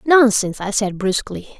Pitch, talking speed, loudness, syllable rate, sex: 215 Hz, 150 wpm, -18 LUFS, 4.7 syllables/s, female